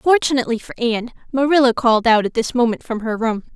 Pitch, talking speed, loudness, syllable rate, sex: 240 Hz, 205 wpm, -18 LUFS, 6.6 syllables/s, female